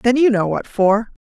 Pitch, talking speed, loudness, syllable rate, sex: 225 Hz, 235 wpm, -17 LUFS, 4.5 syllables/s, female